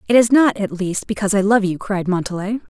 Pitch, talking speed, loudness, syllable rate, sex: 205 Hz, 240 wpm, -18 LUFS, 6.2 syllables/s, female